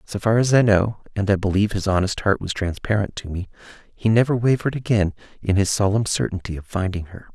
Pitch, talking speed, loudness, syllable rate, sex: 100 Hz, 195 wpm, -21 LUFS, 6.1 syllables/s, male